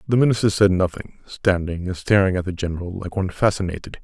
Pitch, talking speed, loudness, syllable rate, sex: 95 Hz, 195 wpm, -21 LUFS, 6.3 syllables/s, male